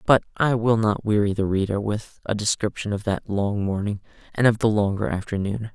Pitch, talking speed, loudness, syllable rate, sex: 105 Hz, 200 wpm, -23 LUFS, 5.3 syllables/s, male